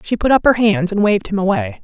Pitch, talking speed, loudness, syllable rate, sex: 210 Hz, 295 wpm, -15 LUFS, 6.5 syllables/s, female